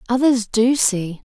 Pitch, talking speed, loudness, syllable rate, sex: 230 Hz, 140 wpm, -18 LUFS, 3.8 syllables/s, female